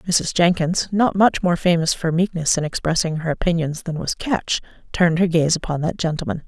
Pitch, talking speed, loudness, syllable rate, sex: 170 Hz, 195 wpm, -20 LUFS, 5.2 syllables/s, female